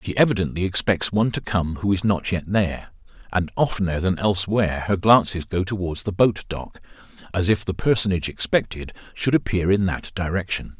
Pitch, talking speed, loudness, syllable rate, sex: 95 Hz, 180 wpm, -22 LUFS, 5.7 syllables/s, male